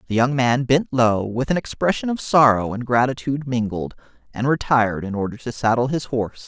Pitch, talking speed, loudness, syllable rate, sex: 125 Hz, 195 wpm, -20 LUFS, 5.6 syllables/s, male